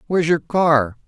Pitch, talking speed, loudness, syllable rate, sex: 155 Hz, 165 wpm, -18 LUFS, 4.8 syllables/s, male